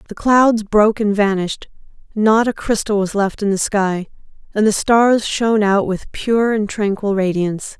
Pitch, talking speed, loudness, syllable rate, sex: 210 Hz, 175 wpm, -16 LUFS, 4.6 syllables/s, female